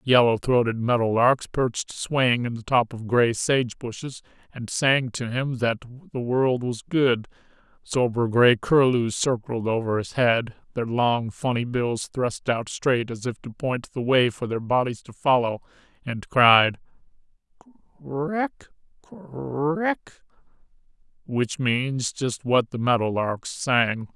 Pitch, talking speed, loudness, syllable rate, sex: 125 Hz, 155 wpm, -23 LUFS, 3.9 syllables/s, male